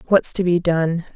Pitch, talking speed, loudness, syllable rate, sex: 175 Hz, 205 wpm, -19 LUFS, 4.6 syllables/s, female